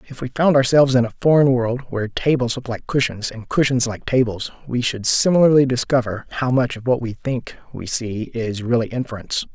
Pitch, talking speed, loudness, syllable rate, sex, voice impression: 125 Hz, 200 wpm, -19 LUFS, 5.7 syllables/s, male, very masculine, very adult-like, slightly old, very thick, slightly relaxed, powerful, bright, hard, clear, slightly fluent, slightly raspy, cool, very intellectual, slightly refreshing, very sincere, very calm, very mature, friendly, reassuring, very unique, elegant, wild, slightly sweet, lively, kind, slightly intense